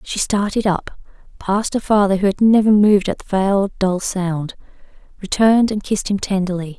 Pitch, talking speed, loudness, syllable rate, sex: 200 Hz, 170 wpm, -17 LUFS, 5.6 syllables/s, female